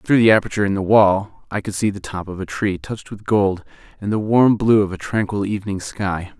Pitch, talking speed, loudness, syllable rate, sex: 100 Hz, 245 wpm, -19 LUFS, 5.6 syllables/s, male